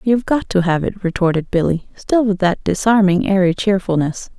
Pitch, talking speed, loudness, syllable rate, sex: 195 Hz, 180 wpm, -17 LUFS, 5.3 syllables/s, female